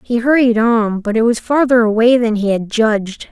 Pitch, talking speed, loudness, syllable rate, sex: 230 Hz, 215 wpm, -14 LUFS, 5.0 syllables/s, female